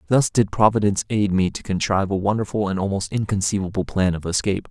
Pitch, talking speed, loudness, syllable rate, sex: 100 Hz, 190 wpm, -21 LUFS, 6.5 syllables/s, male